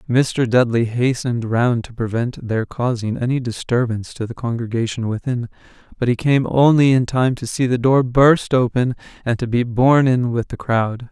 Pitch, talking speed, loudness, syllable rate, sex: 120 Hz, 185 wpm, -18 LUFS, 4.9 syllables/s, male